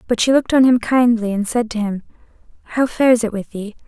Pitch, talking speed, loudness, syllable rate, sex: 230 Hz, 230 wpm, -17 LUFS, 6.2 syllables/s, female